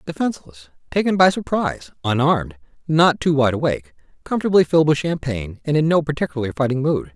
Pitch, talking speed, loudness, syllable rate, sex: 140 Hz, 160 wpm, -19 LUFS, 6.6 syllables/s, male